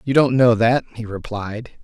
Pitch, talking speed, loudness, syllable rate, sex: 115 Hz, 195 wpm, -18 LUFS, 4.1 syllables/s, male